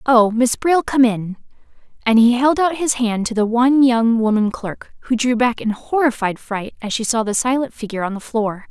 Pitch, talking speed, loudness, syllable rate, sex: 235 Hz, 220 wpm, -17 LUFS, 5.1 syllables/s, female